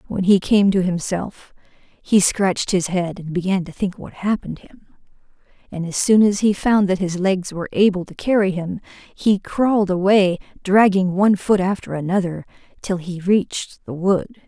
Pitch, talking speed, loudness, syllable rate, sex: 190 Hz, 180 wpm, -19 LUFS, 4.8 syllables/s, female